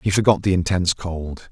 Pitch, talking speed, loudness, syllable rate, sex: 90 Hz, 200 wpm, -20 LUFS, 5.4 syllables/s, male